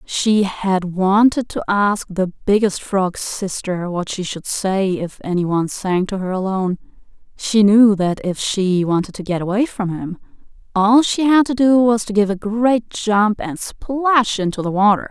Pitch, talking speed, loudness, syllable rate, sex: 200 Hz, 185 wpm, -18 LUFS, 4.2 syllables/s, female